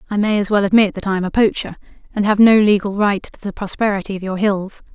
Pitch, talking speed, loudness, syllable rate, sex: 200 Hz, 255 wpm, -17 LUFS, 6.4 syllables/s, female